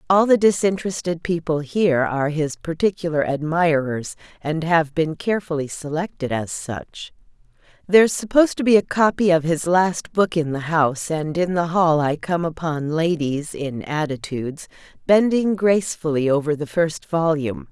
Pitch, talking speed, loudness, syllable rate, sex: 165 Hz, 150 wpm, -20 LUFS, 4.9 syllables/s, female